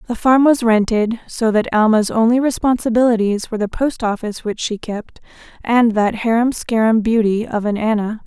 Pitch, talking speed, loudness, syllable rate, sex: 225 Hz, 175 wpm, -16 LUFS, 5.2 syllables/s, female